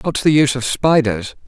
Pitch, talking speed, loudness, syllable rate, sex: 135 Hz, 205 wpm, -16 LUFS, 5.2 syllables/s, male